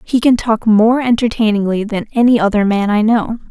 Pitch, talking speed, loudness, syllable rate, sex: 220 Hz, 190 wpm, -13 LUFS, 5.2 syllables/s, female